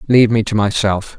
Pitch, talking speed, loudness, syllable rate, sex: 110 Hz, 200 wpm, -15 LUFS, 5.9 syllables/s, male